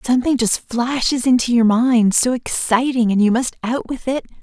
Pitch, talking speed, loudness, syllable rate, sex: 240 Hz, 190 wpm, -17 LUFS, 5.0 syllables/s, female